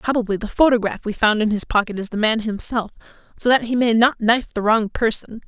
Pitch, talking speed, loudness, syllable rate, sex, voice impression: 225 Hz, 230 wpm, -19 LUFS, 6.0 syllables/s, female, very feminine, very adult-like, middle-aged, very thin, very tensed, slightly powerful, very bright, very hard, very clear, very fluent, slightly cool, slightly intellectual, refreshing, slightly sincere, very unique, slightly elegant, very lively, very strict, very intense, very sharp, light